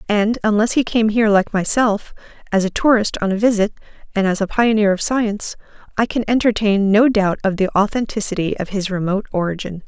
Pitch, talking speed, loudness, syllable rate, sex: 210 Hz, 190 wpm, -18 LUFS, 5.8 syllables/s, female